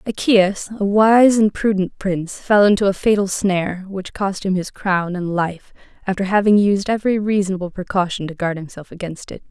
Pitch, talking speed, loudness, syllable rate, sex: 195 Hz, 185 wpm, -18 LUFS, 5.2 syllables/s, female